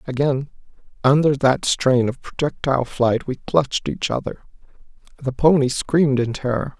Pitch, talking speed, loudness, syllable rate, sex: 135 Hz, 140 wpm, -20 LUFS, 4.8 syllables/s, male